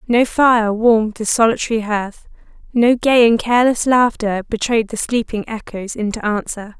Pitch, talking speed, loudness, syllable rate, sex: 225 Hz, 150 wpm, -16 LUFS, 4.8 syllables/s, female